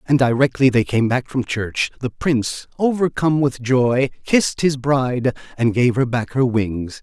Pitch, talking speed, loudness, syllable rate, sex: 130 Hz, 180 wpm, -19 LUFS, 4.7 syllables/s, male